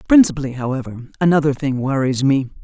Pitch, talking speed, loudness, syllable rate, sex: 140 Hz, 135 wpm, -18 LUFS, 6.5 syllables/s, female